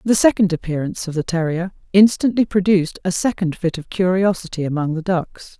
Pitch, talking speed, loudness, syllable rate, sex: 180 Hz, 170 wpm, -19 LUFS, 5.7 syllables/s, female